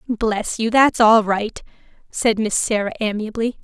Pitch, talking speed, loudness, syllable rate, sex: 220 Hz, 150 wpm, -18 LUFS, 4.3 syllables/s, female